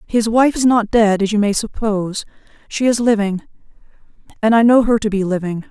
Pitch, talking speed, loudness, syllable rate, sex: 215 Hz, 200 wpm, -16 LUFS, 5.5 syllables/s, female